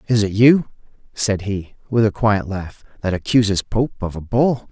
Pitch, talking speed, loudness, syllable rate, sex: 105 Hz, 190 wpm, -19 LUFS, 4.5 syllables/s, male